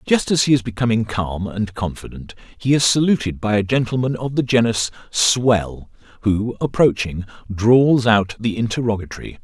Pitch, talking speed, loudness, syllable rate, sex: 110 Hz, 155 wpm, -18 LUFS, 4.8 syllables/s, male